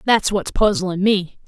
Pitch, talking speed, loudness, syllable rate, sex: 195 Hz, 205 wpm, -18 LUFS, 4.8 syllables/s, female